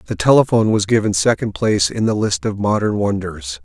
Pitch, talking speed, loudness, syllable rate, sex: 110 Hz, 200 wpm, -17 LUFS, 5.8 syllables/s, male